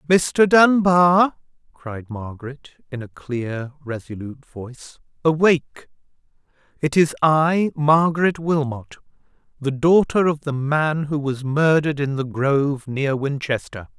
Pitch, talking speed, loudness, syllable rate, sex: 145 Hz, 120 wpm, -19 LUFS, 4.1 syllables/s, male